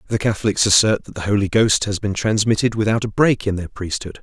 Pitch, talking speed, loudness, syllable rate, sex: 105 Hz, 225 wpm, -18 LUFS, 5.7 syllables/s, male